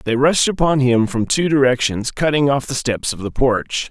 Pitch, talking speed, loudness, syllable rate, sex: 135 Hz, 215 wpm, -17 LUFS, 4.8 syllables/s, male